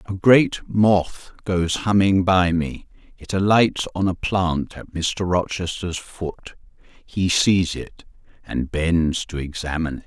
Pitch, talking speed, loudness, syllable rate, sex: 90 Hz, 145 wpm, -21 LUFS, 3.6 syllables/s, male